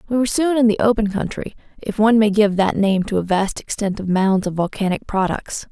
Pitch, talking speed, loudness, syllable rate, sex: 205 Hz, 230 wpm, -18 LUFS, 5.7 syllables/s, female